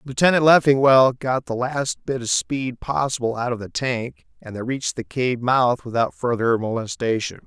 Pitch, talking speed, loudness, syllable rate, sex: 125 Hz, 175 wpm, -21 LUFS, 4.8 syllables/s, male